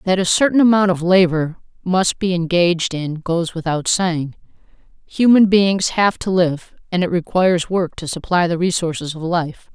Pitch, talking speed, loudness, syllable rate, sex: 180 Hz, 170 wpm, -17 LUFS, 4.7 syllables/s, female